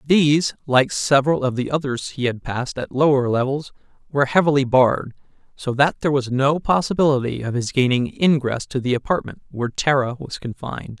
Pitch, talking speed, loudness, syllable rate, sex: 135 Hz, 175 wpm, -20 LUFS, 5.6 syllables/s, male